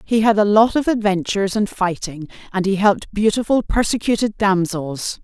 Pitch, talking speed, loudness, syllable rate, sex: 205 Hz, 160 wpm, -18 LUFS, 5.1 syllables/s, female